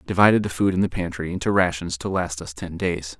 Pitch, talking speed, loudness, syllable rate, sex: 85 Hz, 265 wpm, -23 LUFS, 6.2 syllables/s, male